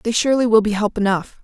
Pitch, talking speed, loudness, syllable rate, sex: 215 Hz, 250 wpm, -17 LUFS, 6.8 syllables/s, female